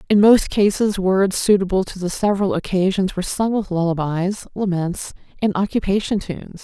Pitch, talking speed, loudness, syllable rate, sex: 190 Hz, 155 wpm, -19 LUFS, 5.3 syllables/s, female